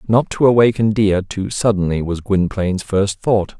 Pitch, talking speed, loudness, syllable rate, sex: 100 Hz, 165 wpm, -17 LUFS, 4.7 syllables/s, male